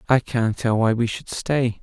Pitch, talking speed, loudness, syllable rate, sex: 115 Hz, 230 wpm, -22 LUFS, 4.3 syllables/s, male